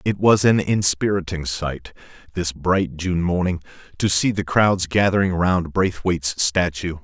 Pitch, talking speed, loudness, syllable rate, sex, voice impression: 90 Hz, 145 wpm, -20 LUFS, 4.2 syllables/s, male, masculine, adult-like, tensed, powerful, slightly hard, muffled, cool, intellectual, calm, mature, wild, lively, slightly strict